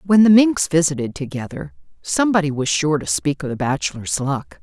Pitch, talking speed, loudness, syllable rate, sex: 150 Hz, 180 wpm, -18 LUFS, 5.4 syllables/s, female